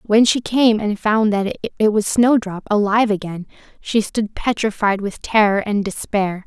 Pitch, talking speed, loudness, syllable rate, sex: 210 Hz, 165 wpm, -18 LUFS, 4.4 syllables/s, female